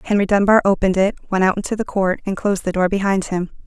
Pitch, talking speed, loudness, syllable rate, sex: 195 Hz, 245 wpm, -18 LUFS, 6.9 syllables/s, female